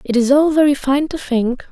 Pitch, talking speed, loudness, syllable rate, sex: 275 Hz, 245 wpm, -15 LUFS, 5.0 syllables/s, female